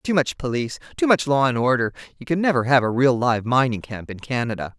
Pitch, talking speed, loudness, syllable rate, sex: 130 Hz, 225 wpm, -21 LUFS, 6.0 syllables/s, female